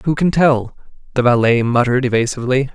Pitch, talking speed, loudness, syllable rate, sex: 125 Hz, 155 wpm, -16 LUFS, 6.4 syllables/s, male